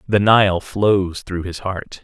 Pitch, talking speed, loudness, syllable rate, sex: 95 Hz, 175 wpm, -18 LUFS, 3.3 syllables/s, male